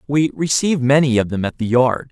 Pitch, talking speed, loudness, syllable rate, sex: 130 Hz, 225 wpm, -17 LUFS, 5.7 syllables/s, male